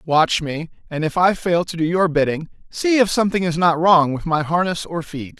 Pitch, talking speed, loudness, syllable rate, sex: 170 Hz, 235 wpm, -18 LUFS, 5.1 syllables/s, male